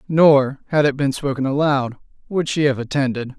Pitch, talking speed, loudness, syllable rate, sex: 140 Hz, 175 wpm, -19 LUFS, 5.1 syllables/s, male